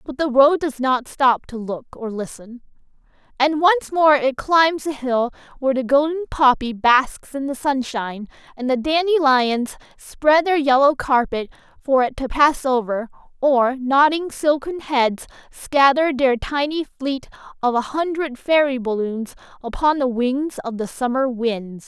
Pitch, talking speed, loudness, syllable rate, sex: 270 Hz, 155 wpm, -19 LUFS, 4.1 syllables/s, female